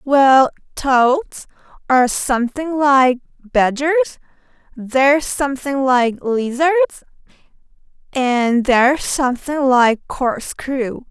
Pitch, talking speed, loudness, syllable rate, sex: 270 Hz, 70 wpm, -16 LUFS, 3.6 syllables/s, female